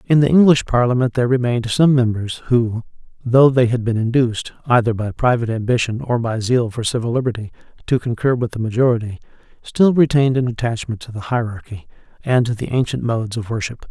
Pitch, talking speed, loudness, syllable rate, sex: 120 Hz, 185 wpm, -18 LUFS, 6.1 syllables/s, male